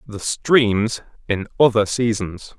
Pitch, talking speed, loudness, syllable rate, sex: 110 Hz, 115 wpm, -19 LUFS, 3.3 syllables/s, male